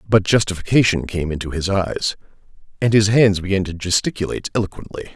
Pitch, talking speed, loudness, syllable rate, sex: 95 Hz, 150 wpm, -19 LUFS, 6.2 syllables/s, male